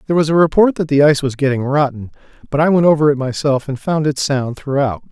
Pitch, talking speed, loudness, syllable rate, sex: 145 Hz, 245 wpm, -15 LUFS, 6.5 syllables/s, male